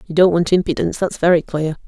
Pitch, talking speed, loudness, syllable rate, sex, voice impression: 170 Hz, 225 wpm, -17 LUFS, 6.6 syllables/s, female, slightly gender-neutral, adult-like, fluent, intellectual, calm